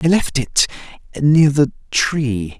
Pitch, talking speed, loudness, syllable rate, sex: 140 Hz, 140 wpm, -17 LUFS, 3.3 syllables/s, male